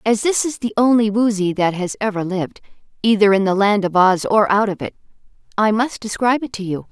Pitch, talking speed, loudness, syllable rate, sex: 210 Hz, 225 wpm, -17 LUFS, 5.8 syllables/s, female